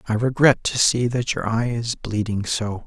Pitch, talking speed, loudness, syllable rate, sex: 115 Hz, 210 wpm, -21 LUFS, 4.5 syllables/s, male